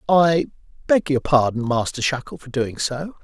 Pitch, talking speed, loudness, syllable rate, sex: 140 Hz, 150 wpm, -21 LUFS, 4.6 syllables/s, male